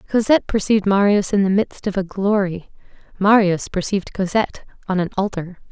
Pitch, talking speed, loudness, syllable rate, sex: 195 Hz, 155 wpm, -19 LUFS, 5.7 syllables/s, female